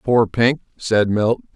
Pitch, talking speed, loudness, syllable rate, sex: 115 Hz, 155 wpm, -18 LUFS, 3.4 syllables/s, male